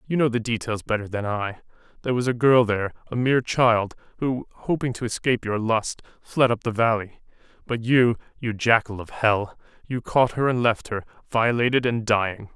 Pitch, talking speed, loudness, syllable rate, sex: 115 Hz, 190 wpm, -23 LUFS, 5.4 syllables/s, male